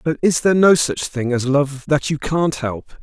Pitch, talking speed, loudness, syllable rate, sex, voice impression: 145 Hz, 240 wpm, -18 LUFS, 4.8 syllables/s, male, masculine, adult-like, slightly dark, sincere, calm